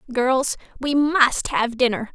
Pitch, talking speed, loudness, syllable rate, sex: 260 Hz, 140 wpm, -20 LUFS, 3.7 syllables/s, female